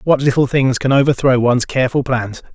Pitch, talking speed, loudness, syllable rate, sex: 130 Hz, 190 wpm, -15 LUFS, 5.9 syllables/s, male